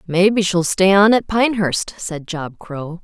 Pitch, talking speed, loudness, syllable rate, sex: 185 Hz, 180 wpm, -16 LUFS, 4.6 syllables/s, female